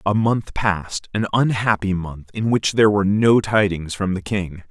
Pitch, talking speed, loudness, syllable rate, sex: 100 Hz, 190 wpm, -20 LUFS, 4.8 syllables/s, male